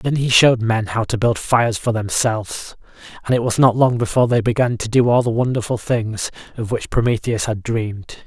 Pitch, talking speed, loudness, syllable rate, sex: 115 Hz, 210 wpm, -18 LUFS, 5.5 syllables/s, male